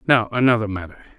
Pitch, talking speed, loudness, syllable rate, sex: 110 Hz, 150 wpm, -19 LUFS, 6.5 syllables/s, male